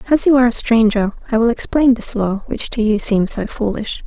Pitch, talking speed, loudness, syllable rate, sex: 225 Hz, 235 wpm, -16 LUFS, 5.5 syllables/s, female